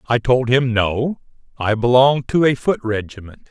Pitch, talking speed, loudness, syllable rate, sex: 120 Hz, 170 wpm, -17 LUFS, 4.6 syllables/s, male